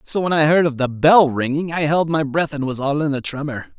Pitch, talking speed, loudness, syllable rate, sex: 150 Hz, 285 wpm, -18 LUFS, 5.5 syllables/s, male